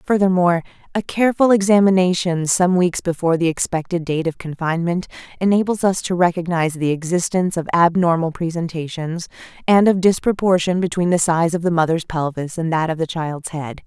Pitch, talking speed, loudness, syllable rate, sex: 175 Hz, 160 wpm, -18 LUFS, 5.7 syllables/s, female